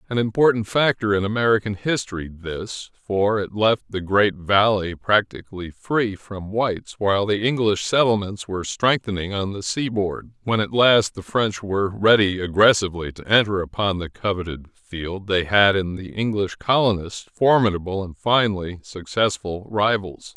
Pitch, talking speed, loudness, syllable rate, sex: 100 Hz, 150 wpm, -21 LUFS, 4.8 syllables/s, male